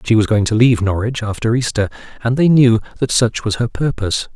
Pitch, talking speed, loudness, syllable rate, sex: 115 Hz, 220 wpm, -16 LUFS, 6.0 syllables/s, male